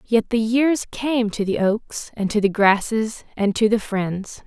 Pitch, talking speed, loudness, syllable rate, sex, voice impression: 220 Hz, 200 wpm, -21 LUFS, 3.9 syllables/s, female, feminine, adult-like, soft, slightly muffled, slightly raspy, refreshing, friendly, slightly sweet